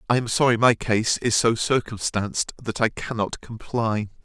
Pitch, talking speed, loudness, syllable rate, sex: 110 Hz, 170 wpm, -23 LUFS, 4.7 syllables/s, male